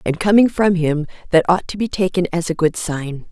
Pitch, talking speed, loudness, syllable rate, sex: 175 Hz, 235 wpm, -18 LUFS, 5.2 syllables/s, female